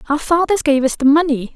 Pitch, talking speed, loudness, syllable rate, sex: 295 Hz, 230 wpm, -15 LUFS, 6.3 syllables/s, female